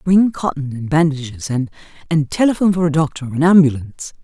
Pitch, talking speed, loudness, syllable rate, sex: 155 Hz, 155 wpm, -17 LUFS, 6.0 syllables/s, female